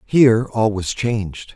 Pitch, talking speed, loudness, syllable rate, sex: 110 Hz, 155 wpm, -18 LUFS, 4.1 syllables/s, male